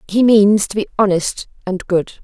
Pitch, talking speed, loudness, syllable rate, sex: 200 Hz, 190 wpm, -15 LUFS, 4.5 syllables/s, female